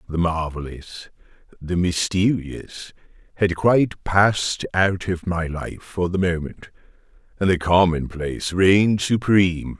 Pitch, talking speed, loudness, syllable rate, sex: 90 Hz, 110 wpm, -20 LUFS, 4.1 syllables/s, male